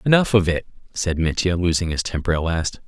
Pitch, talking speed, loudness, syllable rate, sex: 90 Hz, 210 wpm, -21 LUFS, 5.7 syllables/s, male